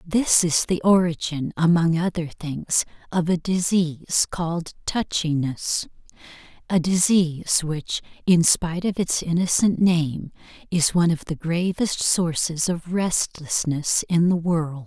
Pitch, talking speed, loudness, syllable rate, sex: 170 Hz, 125 wpm, -22 LUFS, 4.0 syllables/s, female